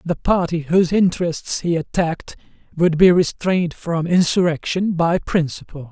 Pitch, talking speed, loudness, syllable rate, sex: 170 Hz, 130 wpm, -18 LUFS, 4.9 syllables/s, male